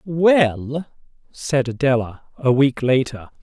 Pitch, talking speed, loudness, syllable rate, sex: 135 Hz, 105 wpm, -19 LUFS, 3.3 syllables/s, male